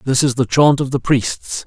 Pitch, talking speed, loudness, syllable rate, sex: 130 Hz, 250 wpm, -16 LUFS, 4.3 syllables/s, male